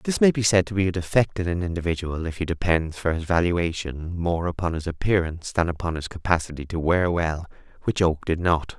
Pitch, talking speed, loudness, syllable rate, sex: 85 Hz, 220 wpm, -24 LUFS, 5.7 syllables/s, male